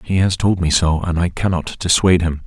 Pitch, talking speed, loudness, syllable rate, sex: 85 Hz, 245 wpm, -17 LUFS, 5.5 syllables/s, male